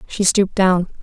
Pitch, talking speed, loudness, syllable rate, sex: 190 Hz, 175 wpm, -16 LUFS, 5.3 syllables/s, female